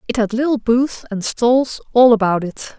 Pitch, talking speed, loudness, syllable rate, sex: 230 Hz, 195 wpm, -16 LUFS, 4.5 syllables/s, female